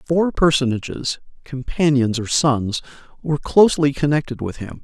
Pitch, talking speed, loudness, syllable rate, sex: 140 Hz, 125 wpm, -19 LUFS, 4.9 syllables/s, male